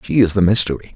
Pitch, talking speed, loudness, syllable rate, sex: 95 Hz, 250 wpm, -15 LUFS, 7.1 syllables/s, male